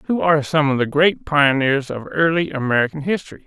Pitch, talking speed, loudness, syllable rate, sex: 145 Hz, 190 wpm, -18 LUFS, 5.5 syllables/s, male